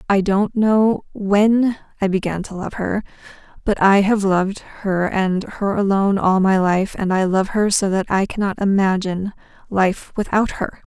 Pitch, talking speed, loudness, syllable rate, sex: 195 Hz, 175 wpm, -18 LUFS, 4.5 syllables/s, female